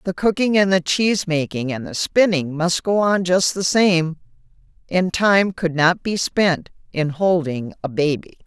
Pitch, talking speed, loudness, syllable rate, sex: 175 Hz, 175 wpm, -19 LUFS, 4.3 syllables/s, female